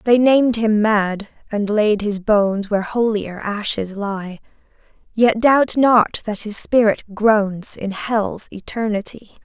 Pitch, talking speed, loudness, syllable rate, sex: 215 Hz, 140 wpm, -18 LUFS, 3.8 syllables/s, female